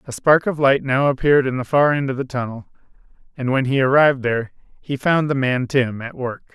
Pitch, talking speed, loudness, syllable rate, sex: 135 Hz, 230 wpm, -19 LUFS, 5.7 syllables/s, male